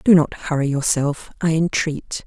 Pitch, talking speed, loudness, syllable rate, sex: 155 Hz, 160 wpm, -20 LUFS, 4.3 syllables/s, female